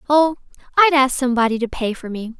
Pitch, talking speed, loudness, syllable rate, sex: 260 Hz, 200 wpm, -18 LUFS, 6.2 syllables/s, female